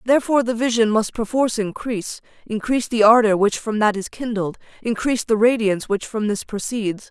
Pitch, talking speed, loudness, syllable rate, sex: 220 Hz, 175 wpm, -20 LUFS, 5.8 syllables/s, female